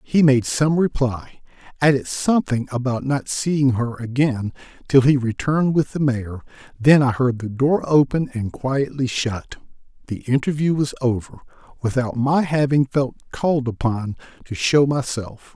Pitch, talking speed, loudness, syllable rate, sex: 130 Hz, 150 wpm, -20 LUFS, 4.4 syllables/s, male